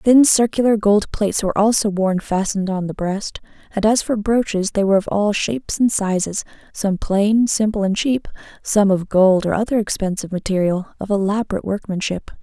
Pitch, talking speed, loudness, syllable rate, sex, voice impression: 205 Hz, 180 wpm, -18 LUFS, 5.4 syllables/s, female, feminine, slightly adult-like, soft, slightly cute, slightly friendly, reassuring, kind